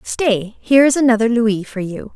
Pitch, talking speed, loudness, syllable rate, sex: 230 Hz, 195 wpm, -16 LUFS, 4.9 syllables/s, female